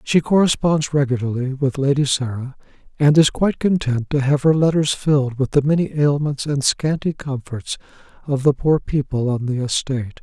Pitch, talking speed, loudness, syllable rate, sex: 140 Hz, 170 wpm, -19 LUFS, 5.2 syllables/s, male